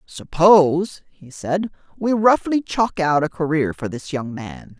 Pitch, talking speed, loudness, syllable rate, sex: 170 Hz, 165 wpm, -19 LUFS, 3.9 syllables/s, male